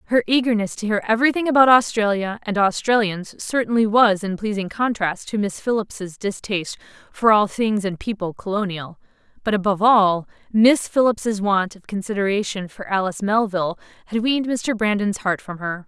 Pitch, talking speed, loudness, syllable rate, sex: 210 Hz, 160 wpm, -20 LUFS, 5.3 syllables/s, female